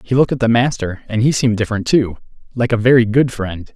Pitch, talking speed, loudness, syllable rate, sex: 115 Hz, 225 wpm, -16 LUFS, 6.8 syllables/s, male